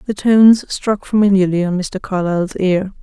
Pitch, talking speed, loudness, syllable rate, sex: 195 Hz, 160 wpm, -15 LUFS, 5.1 syllables/s, female